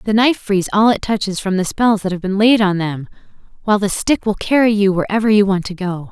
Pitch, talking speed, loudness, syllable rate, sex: 200 Hz, 255 wpm, -16 LUFS, 5.9 syllables/s, female